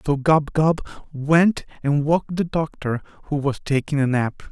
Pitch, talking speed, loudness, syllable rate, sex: 150 Hz, 175 wpm, -21 LUFS, 4.3 syllables/s, male